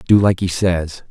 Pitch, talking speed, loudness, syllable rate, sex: 90 Hz, 215 wpm, -17 LUFS, 4.3 syllables/s, male